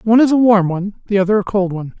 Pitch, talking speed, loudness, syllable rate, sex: 200 Hz, 300 wpm, -15 LUFS, 8.1 syllables/s, male